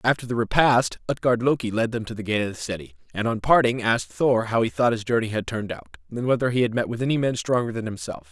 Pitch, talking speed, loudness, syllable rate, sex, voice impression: 115 Hz, 265 wpm, -23 LUFS, 6.5 syllables/s, male, masculine, adult-like, slightly powerful, fluent, slightly sincere, slightly unique, slightly intense